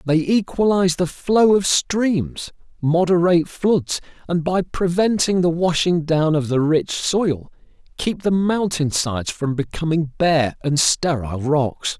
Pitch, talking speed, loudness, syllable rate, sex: 165 Hz, 140 wpm, -19 LUFS, 4.0 syllables/s, male